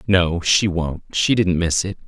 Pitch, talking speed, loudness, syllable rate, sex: 90 Hz, 205 wpm, -19 LUFS, 3.8 syllables/s, male